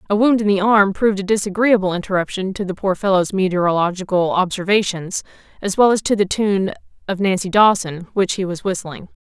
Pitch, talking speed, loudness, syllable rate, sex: 195 Hz, 180 wpm, -18 LUFS, 5.8 syllables/s, female